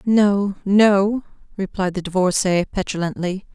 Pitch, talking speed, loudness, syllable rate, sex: 195 Hz, 100 wpm, -19 LUFS, 4.1 syllables/s, female